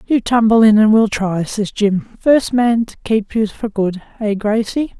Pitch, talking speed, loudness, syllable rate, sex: 220 Hz, 190 wpm, -15 LUFS, 4.2 syllables/s, female